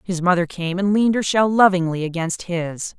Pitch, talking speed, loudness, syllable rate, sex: 180 Hz, 200 wpm, -19 LUFS, 5.2 syllables/s, female